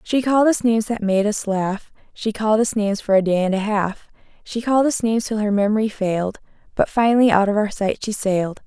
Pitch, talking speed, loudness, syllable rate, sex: 215 Hz, 235 wpm, -19 LUFS, 6.0 syllables/s, female